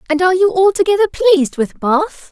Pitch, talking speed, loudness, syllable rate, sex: 355 Hz, 180 wpm, -14 LUFS, 6.9 syllables/s, female